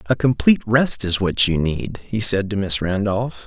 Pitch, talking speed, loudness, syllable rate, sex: 100 Hz, 210 wpm, -18 LUFS, 4.6 syllables/s, male